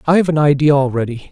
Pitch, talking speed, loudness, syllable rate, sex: 145 Hz, 185 wpm, -14 LUFS, 6.8 syllables/s, male